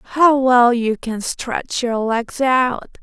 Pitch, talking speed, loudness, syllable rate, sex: 245 Hz, 160 wpm, -17 LUFS, 2.8 syllables/s, female